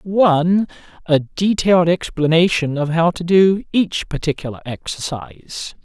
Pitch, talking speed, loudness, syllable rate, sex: 170 Hz, 115 wpm, -17 LUFS, 4.7 syllables/s, male